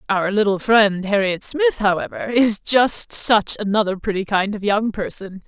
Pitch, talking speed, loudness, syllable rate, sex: 205 Hz, 165 wpm, -18 LUFS, 4.4 syllables/s, female